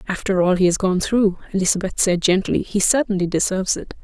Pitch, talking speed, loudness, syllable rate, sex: 190 Hz, 195 wpm, -19 LUFS, 6.1 syllables/s, female